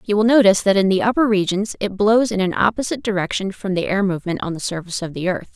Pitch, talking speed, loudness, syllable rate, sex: 200 Hz, 260 wpm, -19 LUFS, 6.9 syllables/s, female